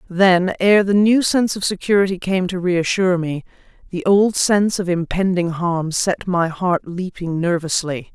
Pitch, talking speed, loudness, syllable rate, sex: 185 Hz, 160 wpm, -18 LUFS, 4.6 syllables/s, female